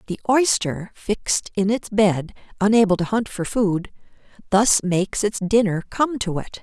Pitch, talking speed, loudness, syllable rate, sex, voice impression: 205 Hz, 165 wpm, -21 LUFS, 4.5 syllables/s, female, feminine, very adult-like, slightly fluent, sincere, slightly elegant, slightly sweet